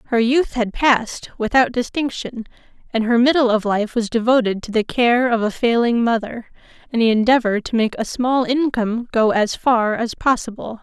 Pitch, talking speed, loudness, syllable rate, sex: 235 Hz, 185 wpm, -18 LUFS, 5.0 syllables/s, female